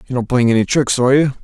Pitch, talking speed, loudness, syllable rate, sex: 125 Hz, 290 wpm, -15 LUFS, 8.1 syllables/s, male